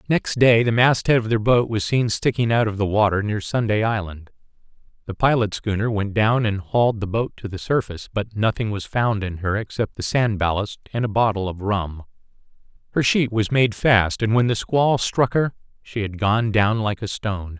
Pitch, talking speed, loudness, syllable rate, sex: 110 Hz, 210 wpm, -21 LUFS, 5.0 syllables/s, male